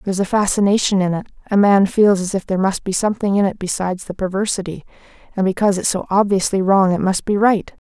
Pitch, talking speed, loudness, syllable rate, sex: 195 Hz, 220 wpm, -17 LUFS, 6.6 syllables/s, female